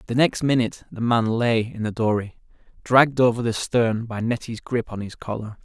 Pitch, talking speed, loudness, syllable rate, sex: 115 Hz, 200 wpm, -22 LUFS, 5.3 syllables/s, male